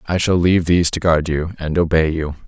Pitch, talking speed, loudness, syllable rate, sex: 85 Hz, 245 wpm, -17 LUFS, 6.0 syllables/s, male